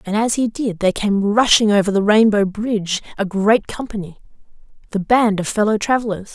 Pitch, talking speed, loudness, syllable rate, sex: 210 Hz, 170 wpm, -17 LUFS, 5.4 syllables/s, female